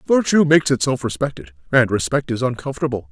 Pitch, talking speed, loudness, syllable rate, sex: 130 Hz, 155 wpm, -19 LUFS, 6.3 syllables/s, male